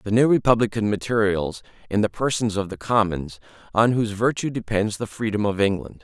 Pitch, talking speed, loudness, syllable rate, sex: 110 Hz, 180 wpm, -22 LUFS, 5.6 syllables/s, male